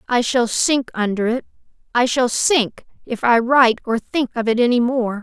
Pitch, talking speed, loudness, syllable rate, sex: 240 Hz, 185 wpm, -18 LUFS, 4.7 syllables/s, female